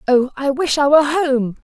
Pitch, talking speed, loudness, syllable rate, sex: 280 Hz, 210 wpm, -16 LUFS, 5.0 syllables/s, female